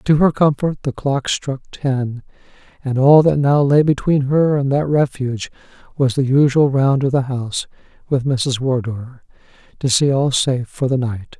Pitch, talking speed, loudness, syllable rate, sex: 135 Hz, 180 wpm, -17 LUFS, 4.6 syllables/s, male